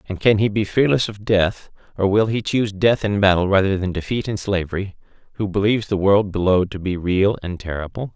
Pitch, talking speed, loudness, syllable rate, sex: 100 Hz, 215 wpm, -19 LUFS, 5.6 syllables/s, male